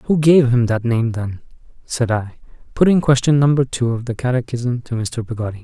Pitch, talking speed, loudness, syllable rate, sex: 125 Hz, 190 wpm, -17 LUFS, 5.2 syllables/s, male